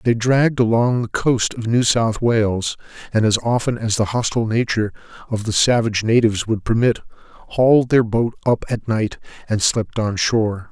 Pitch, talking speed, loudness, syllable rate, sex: 115 Hz, 180 wpm, -18 LUFS, 5.2 syllables/s, male